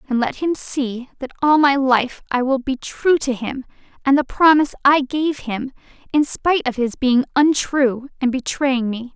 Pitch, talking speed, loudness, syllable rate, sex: 265 Hz, 190 wpm, -18 LUFS, 4.5 syllables/s, female